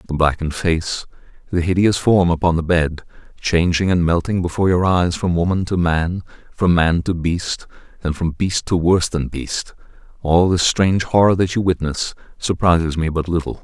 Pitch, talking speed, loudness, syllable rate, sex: 85 Hz, 180 wpm, -18 LUFS, 5.1 syllables/s, male